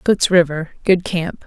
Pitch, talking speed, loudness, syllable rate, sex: 175 Hz, 125 wpm, -17 LUFS, 4.0 syllables/s, female